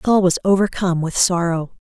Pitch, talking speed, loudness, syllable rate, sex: 180 Hz, 165 wpm, -18 LUFS, 5.6 syllables/s, female